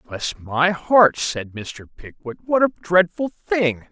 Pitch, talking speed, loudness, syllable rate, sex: 165 Hz, 155 wpm, -19 LUFS, 3.3 syllables/s, male